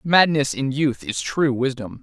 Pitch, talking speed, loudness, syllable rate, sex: 140 Hz, 180 wpm, -21 LUFS, 4.2 syllables/s, male